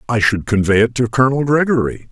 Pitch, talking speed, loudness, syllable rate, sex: 115 Hz, 200 wpm, -15 LUFS, 6.2 syllables/s, male